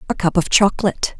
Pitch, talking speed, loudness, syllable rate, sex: 185 Hz, 200 wpm, -17 LUFS, 7.0 syllables/s, female